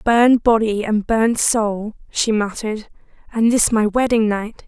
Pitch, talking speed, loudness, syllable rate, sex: 220 Hz, 155 wpm, -17 LUFS, 4.5 syllables/s, female